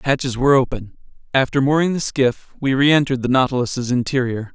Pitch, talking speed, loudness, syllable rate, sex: 130 Hz, 170 wpm, -18 LUFS, 6.0 syllables/s, male